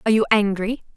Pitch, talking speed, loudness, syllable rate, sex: 210 Hz, 190 wpm, -20 LUFS, 7.3 syllables/s, female